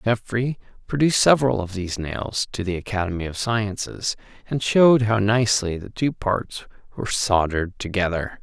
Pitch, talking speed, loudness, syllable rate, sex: 105 Hz, 155 wpm, -22 LUFS, 5.5 syllables/s, male